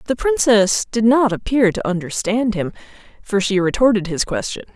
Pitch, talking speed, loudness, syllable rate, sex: 220 Hz, 165 wpm, -18 LUFS, 5.1 syllables/s, female